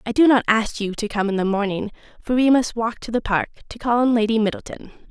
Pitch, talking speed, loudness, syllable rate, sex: 225 Hz, 260 wpm, -20 LUFS, 6.0 syllables/s, female